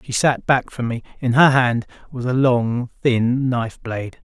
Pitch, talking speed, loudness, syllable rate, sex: 125 Hz, 195 wpm, -19 LUFS, 4.4 syllables/s, male